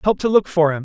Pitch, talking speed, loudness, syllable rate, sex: 180 Hz, 355 wpm, -17 LUFS, 6.6 syllables/s, male